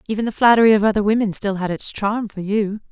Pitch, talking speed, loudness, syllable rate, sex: 210 Hz, 245 wpm, -18 LUFS, 6.4 syllables/s, female